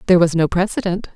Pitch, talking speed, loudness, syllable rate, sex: 175 Hz, 210 wpm, -17 LUFS, 7.2 syllables/s, female